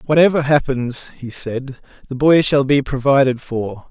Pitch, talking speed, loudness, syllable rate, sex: 135 Hz, 155 wpm, -17 LUFS, 4.5 syllables/s, male